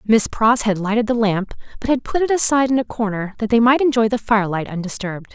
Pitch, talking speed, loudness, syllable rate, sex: 225 Hz, 245 wpm, -18 LUFS, 6.0 syllables/s, female